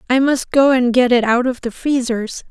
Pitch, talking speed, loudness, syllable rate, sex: 250 Hz, 240 wpm, -16 LUFS, 4.9 syllables/s, female